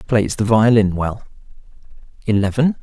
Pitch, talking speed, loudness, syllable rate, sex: 110 Hz, 105 wpm, -17 LUFS, 4.9 syllables/s, male